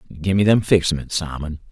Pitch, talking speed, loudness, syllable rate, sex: 85 Hz, 210 wpm, -19 LUFS, 5.9 syllables/s, male